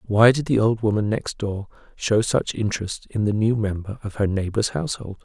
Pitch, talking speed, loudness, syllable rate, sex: 105 Hz, 205 wpm, -22 LUFS, 5.2 syllables/s, male